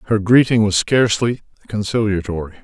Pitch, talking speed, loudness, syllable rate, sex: 105 Hz, 115 wpm, -17 LUFS, 5.8 syllables/s, male